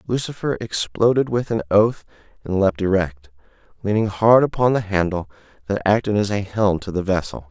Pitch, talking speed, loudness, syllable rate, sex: 100 Hz, 170 wpm, -20 LUFS, 5.2 syllables/s, male